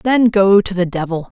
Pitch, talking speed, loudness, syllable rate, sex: 195 Hz, 215 wpm, -15 LUFS, 4.7 syllables/s, female